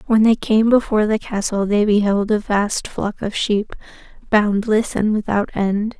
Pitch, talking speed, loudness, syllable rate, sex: 210 Hz, 170 wpm, -18 LUFS, 4.4 syllables/s, female